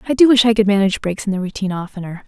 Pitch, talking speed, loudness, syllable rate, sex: 205 Hz, 290 wpm, -16 LUFS, 8.1 syllables/s, female